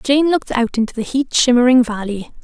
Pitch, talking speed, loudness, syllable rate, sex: 245 Hz, 195 wpm, -16 LUFS, 5.7 syllables/s, female